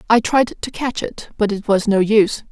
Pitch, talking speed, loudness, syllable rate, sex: 215 Hz, 240 wpm, -18 LUFS, 5.0 syllables/s, female